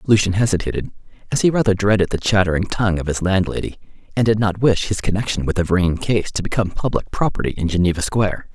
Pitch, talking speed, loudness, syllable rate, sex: 95 Hz, 205 wpm, -19 LUFS, 6.5 syllables/s, male